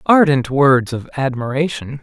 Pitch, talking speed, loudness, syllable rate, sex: 140 Hz, 120 wpm, -16 LUFS, 4.3 syllables/s, male